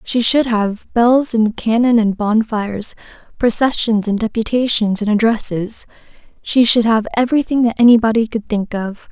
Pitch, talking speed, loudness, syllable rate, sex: 225 Hz, 140 wpm, -15 LUFS, 4.8 syllables/s, female